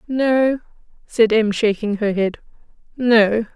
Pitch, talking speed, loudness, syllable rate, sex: 225 Hz, 120 wpm, -18 LUFS, 3.4 syllables/s, female